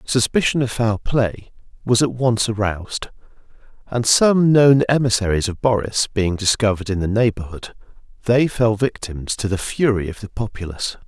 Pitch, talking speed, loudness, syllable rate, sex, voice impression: 110 Hz, 150 wpm, -19 LUFS, 5.0 syllables/s, male, masculine, adult-like, clear, fluent, raspy, sincere, slightly friendly, reassuring, slightly wild, kind, slightly modest